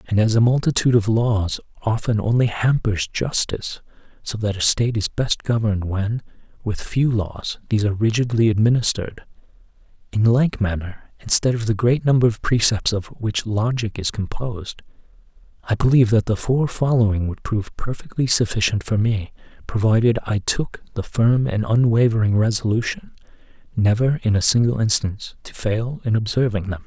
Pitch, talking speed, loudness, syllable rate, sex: 110 Hz, 155 wpm, -20 LUFS, 5.3 syllables/s, male